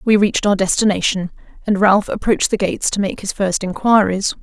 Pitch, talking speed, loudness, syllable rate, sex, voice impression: 200 Hz, 190 wpm, -17 LUFS, 5.9 syllables/s, female, feminine, adult-like, slightly powerful, slightly sincere, reassuring